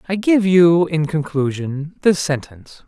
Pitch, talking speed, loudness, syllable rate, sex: 160 Hz, 145 wpm, -17 LUFS, 4.2 syllables/s, male